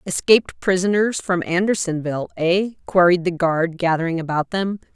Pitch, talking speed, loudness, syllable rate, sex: 180 Hz, 135 wpm, -19 LUFS, 5.1 syllables/s, female